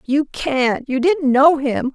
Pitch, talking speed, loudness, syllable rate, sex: 280 Hz, 185 wpm, -17 LUFS, 3.3 syllables/s, female